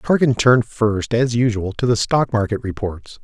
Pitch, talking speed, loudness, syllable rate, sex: 115 Hz, 185 wpm, -18 LUFS, 4.7 syllables/s, male